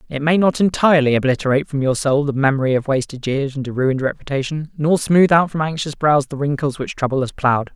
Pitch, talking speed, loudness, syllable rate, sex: 145 Hz, 225 wpm, -18 LUFS, 6.3 syllables/s, male